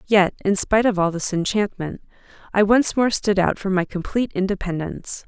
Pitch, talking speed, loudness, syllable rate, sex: 195 Hz, 180 wpm, -21 LUFS, 5.5 syllables/s, female